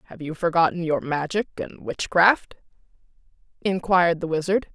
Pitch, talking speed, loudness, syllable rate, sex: 175 Hz, 125 wpm, -23 LUFS, 5.3 syllables/s, female